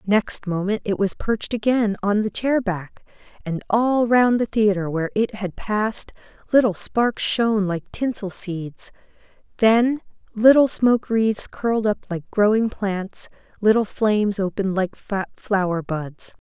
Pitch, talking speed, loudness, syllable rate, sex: 210 Hz, 140 wpm, -21 LUFS, 4.3 syllables/s, female